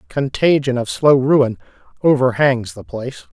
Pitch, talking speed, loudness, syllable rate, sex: 135 Hz, 125 wpm, -16 LUFS, 4.5 syllables/s, male